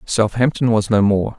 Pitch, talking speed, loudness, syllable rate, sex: 110 Hz, 175 wpm, -17 LUFS, 4.7 syllables/s, male